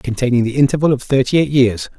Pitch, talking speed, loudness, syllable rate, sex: 130 Hz, 210 wpm, -15 LUFS, 6.4 syllables/s, male